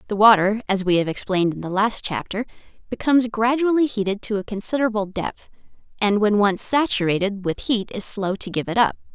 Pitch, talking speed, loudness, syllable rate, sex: 210 Hz, 190 wpm, -21 LUFS, 5.8 syllables/s, female